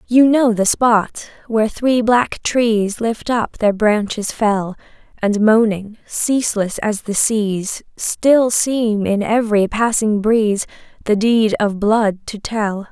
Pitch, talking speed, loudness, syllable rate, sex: 220 Hz, 145 wpm, -16 LUFS, 3.5 syllables/s, female